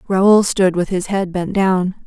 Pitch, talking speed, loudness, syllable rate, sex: 190 Hz, 205 wpm, -16 LUFS, 3.8 syllables/s, female